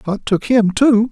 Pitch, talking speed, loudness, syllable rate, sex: 210 Hz, 215 wpm, -15 LUFS, 3.7 syllables/s, male